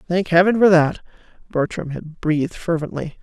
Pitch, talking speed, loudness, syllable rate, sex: 165 Hz, 150 wpm, -19 LUFS, 5.1 syllables/s, female